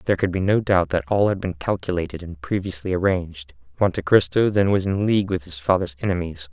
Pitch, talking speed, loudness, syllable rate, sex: 90 Hz, 210 wpm, -21 LUFS, 6.2 syllables/s, male